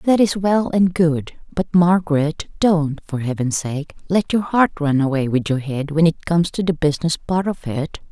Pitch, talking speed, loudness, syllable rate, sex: 160 Hz, 205 wpm, -19 LUFS, 4.7 syllables/s, female